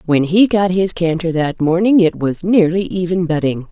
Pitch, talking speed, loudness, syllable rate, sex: 175 Hz, 195 wpm, -15 LUFS, 4.8 syllables/s, female